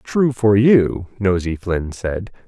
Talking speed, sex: 145 wpm, male